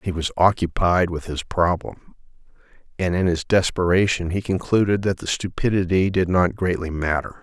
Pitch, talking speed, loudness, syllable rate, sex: 90 Hz, 155 wpm, -21 LUFS, 5.2 syllables/s, male